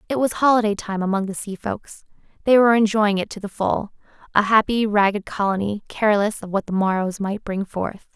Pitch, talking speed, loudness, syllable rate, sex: 205 Hz, 200 wpm, -21 LUFS, 5.5 syllables/s, female